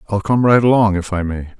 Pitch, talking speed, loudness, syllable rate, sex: 100 Hz, 265 wpm, -15 LUFS, 6.1 syllables/s, male